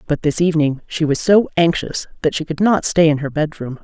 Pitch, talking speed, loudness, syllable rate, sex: 160 Hz, 235 wpm, -17 LUFS, 5.6 syllables/s, female